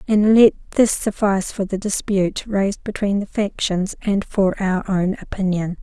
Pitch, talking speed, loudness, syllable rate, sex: 200 Hz, 165 wpm, -19 LUFS, 4.8 syllables/s, female